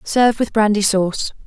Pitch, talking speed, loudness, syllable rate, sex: 210 Hz, 165 wpm, -17 LUFS, 5.5 syllables/s, female